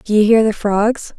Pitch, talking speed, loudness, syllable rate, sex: 215 Hz, 255 wpm, -15 LUFS, 4.6 syllables/s, female